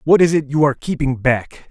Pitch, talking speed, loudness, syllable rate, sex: 145 Hz, 245 wpm, -17 LUFS, 5.6 syllables/s, male